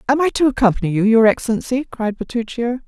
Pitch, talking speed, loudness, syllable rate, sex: 235 Hz, 190 wpm, -17 LUFS, 6.3 syllables/s, female